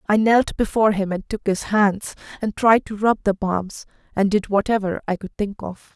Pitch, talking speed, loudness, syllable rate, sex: 205 Hz, 210 wpm, -20 LUFS, 4.9 syllables/s, female